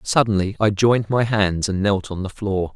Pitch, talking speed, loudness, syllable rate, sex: 100 Hz, 220 wpm, -20 LUFS, 5.0 syllables/s, male